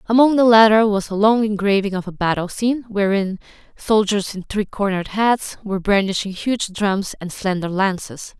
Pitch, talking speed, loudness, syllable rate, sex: 205 Hz, 170 wpm, -18 LUFS, 5.1 syllables/s, female